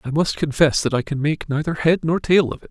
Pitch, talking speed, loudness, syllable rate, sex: 150 Hz, 290 wpm, -19 LUFS, 5.8 syllables/s, male